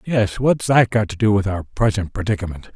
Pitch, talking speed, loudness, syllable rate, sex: 105 Hz, 220 wpm, -19 LUFS, 5.3 syllables/s, male